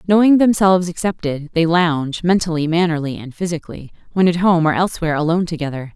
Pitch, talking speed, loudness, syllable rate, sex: 170 Hz, 140 wpm, -17 LUFS, 6.5 syllables/s, female